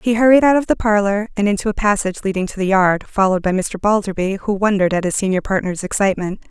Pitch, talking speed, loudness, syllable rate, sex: 200 Hz, 230 wpm, -17 LUFS, 6.9 syllables/s, female